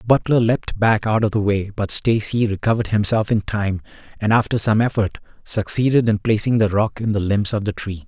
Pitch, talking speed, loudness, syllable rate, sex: 105 Hz, 210 wpm, -19 LUFS, 5.5 syllables/s, male